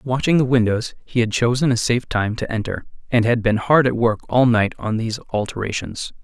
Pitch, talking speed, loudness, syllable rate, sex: 115 Hz, 210 wpm, -19 LUFS, 5.5 syllables/s, male